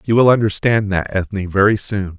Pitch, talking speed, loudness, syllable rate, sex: 100 Hz, 190 wpm, -16 LUFS, 5.3 syllables/s, male